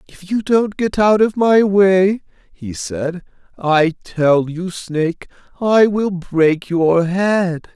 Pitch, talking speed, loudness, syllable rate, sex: 185 Hz, 145 wpm, -16 LUFS, 3.0 syllables/s, male